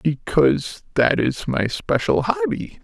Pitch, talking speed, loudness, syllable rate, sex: 125 Hz, 125 wpm, -20 LUFS, 3.8 syllables/s, male